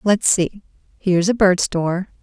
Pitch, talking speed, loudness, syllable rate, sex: 190 Hz, 135 wpm, -18 LUFS, 4.9 syllables/s, female